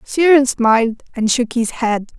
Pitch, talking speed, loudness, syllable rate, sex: 240 Hz, 165 wpm, -15 LUFS, 4.1 syllables/s, female